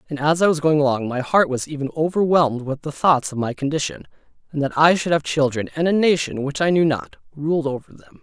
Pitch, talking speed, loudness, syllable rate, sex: 150 Hz, 240 wpm, -20 LUFS, 5.9 syllables/s, male